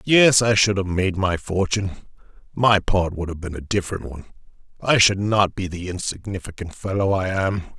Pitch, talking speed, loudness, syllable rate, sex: 95 Hz, 175 wpm, -21 LUFS, 5.4 syllables/s, male